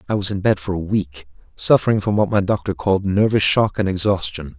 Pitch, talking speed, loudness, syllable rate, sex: 100 Hz, 220 wpm, -19 LUFS, 5.8 syllables/s, male